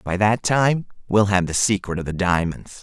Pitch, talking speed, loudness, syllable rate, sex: 100 Hz, 210 wpm, -20 LUFS, 4.7 syllables/s, male